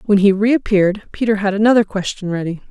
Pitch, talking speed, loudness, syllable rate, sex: 200 Hz, 180 wpm, -16 LUFS, 6.0 syllables/s, female